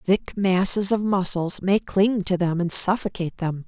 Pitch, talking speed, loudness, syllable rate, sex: 190 Hz, 180 wpm, -21 LUFS, 4.5 syllables/s, female